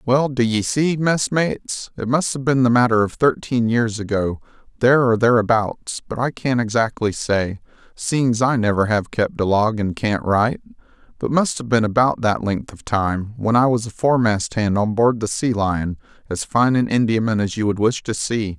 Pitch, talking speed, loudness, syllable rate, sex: 115 Hz, 205 wpm, -19 LUFS, 4.8 syllables/s, male